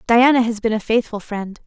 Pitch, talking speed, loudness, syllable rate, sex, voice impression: 225 Hz, 215 wpm, -18 LUFS, 5.3 syllables/s, female, feminine, adult-like, fluent, slightly friendly, elegant, slightly sweet